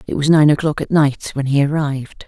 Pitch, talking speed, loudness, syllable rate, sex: 145 Hz, 235 wpm, -16 LUFS, 5.7 syllables/s, female